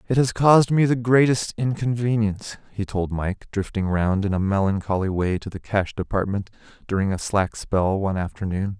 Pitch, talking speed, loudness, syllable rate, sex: 105 Hz, 175 wpm, -22 LUFS, 5.2 syllables/s, male